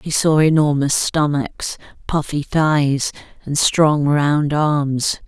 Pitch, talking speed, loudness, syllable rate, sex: 150 Hz, 115 wpm, -17 LUFS, 3.0 syllables/s, female